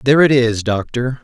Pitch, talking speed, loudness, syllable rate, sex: 125 Hz, 195 wpm, -15 LUFS, 5.4 syllables/s, male